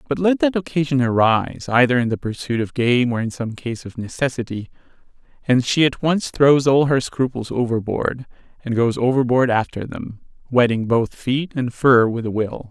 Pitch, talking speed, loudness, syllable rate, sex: 125 Hz, 185 wpm, -19 LUFS, 4.9 syllables/s, male